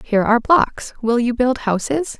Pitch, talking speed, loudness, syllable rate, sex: 245 Hz, 190 wpm, -18 LUFS, 5.0 syllables/s, female